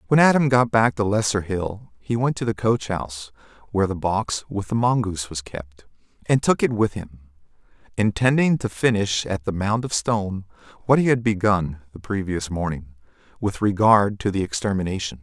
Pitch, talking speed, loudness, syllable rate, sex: 105 Hz, 180 wpm, -22 LUFS, 5.2 syllables/s, male